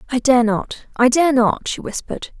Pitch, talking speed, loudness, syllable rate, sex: 250 Hz, 175 wpm, -17 LUFS, 4.7 syllables/s, female